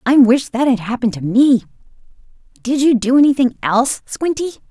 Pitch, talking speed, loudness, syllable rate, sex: 250 Hz, 165 wpm, -15 LUFS, 5.7 syllables/s, female